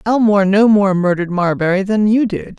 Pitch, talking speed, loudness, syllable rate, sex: 200 Hz, 185 wpm, -14 LUFS, 5.7 syllables/s, female